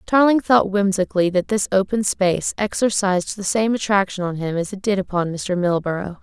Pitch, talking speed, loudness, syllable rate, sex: 195 Hz, 185 wpm, -20 LUFS, 5.3 syllables/s, female